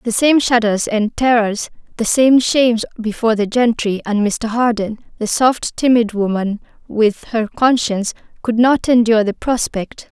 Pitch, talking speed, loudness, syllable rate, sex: 230 Hz, 145 wpm, -16 LUFS, 4.6 syllables/s, female